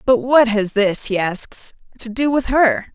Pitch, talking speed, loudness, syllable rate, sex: 240 Hz, 205 wpm, -17 LUFS, 3.9 syllables/s, female